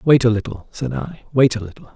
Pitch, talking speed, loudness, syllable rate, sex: 130 Hz, 245 wpm, -19 LUFS, 5.8 syllables/s, male